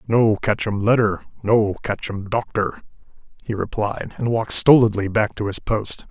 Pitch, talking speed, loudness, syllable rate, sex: 110 Hz, 145 wpm, -20 LUFS, 4.8 syllables/s, male